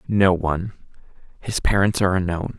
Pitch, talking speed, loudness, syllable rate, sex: 95 Hz, 140 wpm, -21 LUFS, 5.5 syllables/s, male